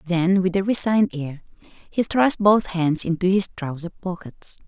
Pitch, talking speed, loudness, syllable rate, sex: 185 Hz, 165 wpm, -21 LUFS, 4.5 syllables/s, female